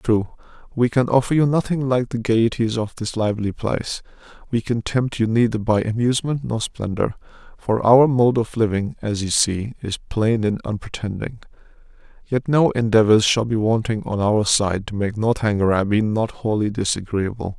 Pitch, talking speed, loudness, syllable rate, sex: 110 Hz, 175 wpm, -20 LUFS, 5.1 syllables/s, male